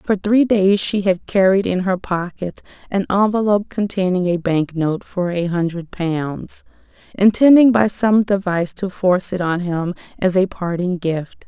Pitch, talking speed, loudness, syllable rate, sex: 190 Hz, 165 wpm, -18 LUFS, 4.4 syllables/s, female